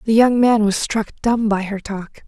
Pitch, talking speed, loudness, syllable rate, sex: 215 Hz, 235 wpm, -17 LUFS, 4.2 syllables/s, female